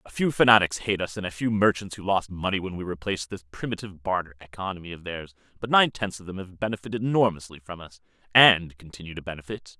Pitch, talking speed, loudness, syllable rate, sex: 95 Hz, 215 wpm, -24 LUFS, 6.4 syllables/s, male